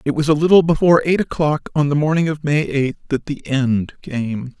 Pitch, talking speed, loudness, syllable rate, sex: 145 Hz, 220 wpm, -17 LUFS, 5.2 syllables/s, male